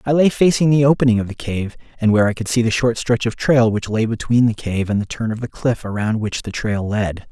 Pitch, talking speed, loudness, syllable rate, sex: 115 Hz, 280 wpm, -18 LUFS, 5.8 syllables/s, male